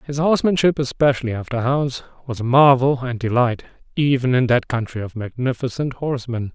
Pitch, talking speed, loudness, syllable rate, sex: 130 Hz, 155 wpm, -19 LUFS, 5.6 syllables/s, male